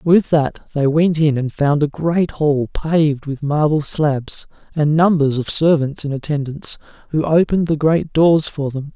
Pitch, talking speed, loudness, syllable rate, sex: 150 Hz, 180 wpm, -17 LUFS, 4.4 syllables/s, male